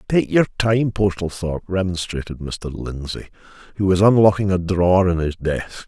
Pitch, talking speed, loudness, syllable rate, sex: 95 Hz, 155 wpm, -19 LUFS, 5.0 syllables/s, male